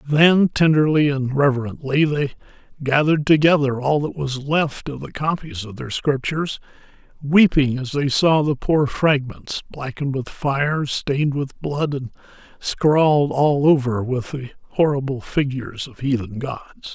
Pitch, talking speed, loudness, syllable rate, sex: 140 Hz, 145 wpm, -20 LUFS, 4.4 syllables/s, male